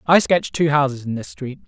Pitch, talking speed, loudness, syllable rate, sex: 145 Hz, 250 wpm, -19 LUFS, 5.4 syllables/s, male